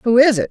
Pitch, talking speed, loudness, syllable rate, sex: 245 Hz, 360 wpm, -14 LUFS, 7.3 syllables/s, female